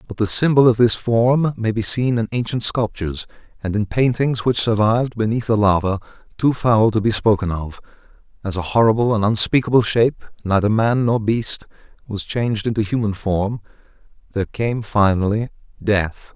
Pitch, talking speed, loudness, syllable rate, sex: 110 Hz, 165 wpm, -18 LUFS, 5.2 syllables/s, male